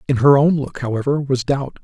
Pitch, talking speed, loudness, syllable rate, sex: 135 Hz, 230 wpm, -17 LUFS, 5.5 syllables/s, male